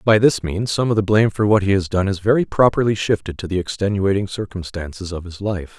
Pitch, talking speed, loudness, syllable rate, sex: 100 Hz, 240 wpm, -19 LUFS, 6.0 syllables/s, male